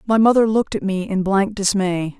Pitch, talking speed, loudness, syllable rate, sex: 200 Hz, 220 wpm, -18 LUFS, 5.4 syllables/s, female